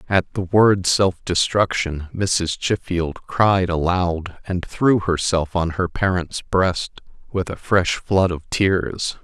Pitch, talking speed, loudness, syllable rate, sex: 90 Hz, 145 wpm, -20 LUFS, 3.3 syllables/s, male